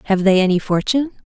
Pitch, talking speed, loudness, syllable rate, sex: 205 Hz, 190 wpm, -17 LUFS, 7.4 syllables/s, female